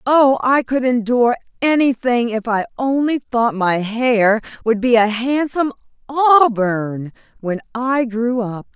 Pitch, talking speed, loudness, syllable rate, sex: 240 Hz, 135 wpm, -17 LUFS, 4.2 syllables/s, female